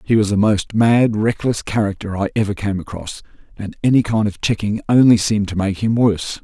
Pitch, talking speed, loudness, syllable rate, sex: 105 Hz, 205 wpm, -17 LUFS, 5.6 syllables/s, male